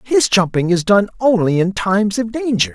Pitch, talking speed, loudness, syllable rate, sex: 200 Hz, 195 wpm, -16 LUFS, 5.1 syllables/s, male